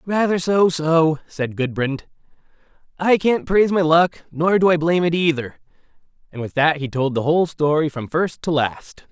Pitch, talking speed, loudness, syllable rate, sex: 160 Hz, 185 wpm, -19 LUFS, 4.8 syllables/s, male